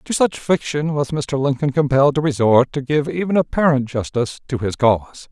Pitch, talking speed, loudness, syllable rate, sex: 140 Hz, 190 wpm, -18 LUFS, 5.5 syllables/s, male